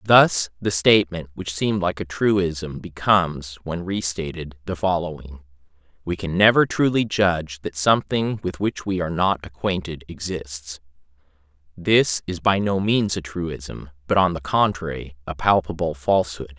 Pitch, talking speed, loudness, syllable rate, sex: 85 Hz, 150 wpm, -22 LUFS, 4.6 syllables/s, male